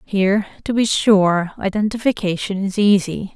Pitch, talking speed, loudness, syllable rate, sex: 200 Hz, 125 wpm, -18 LUFS, 4.7 syllables/s, female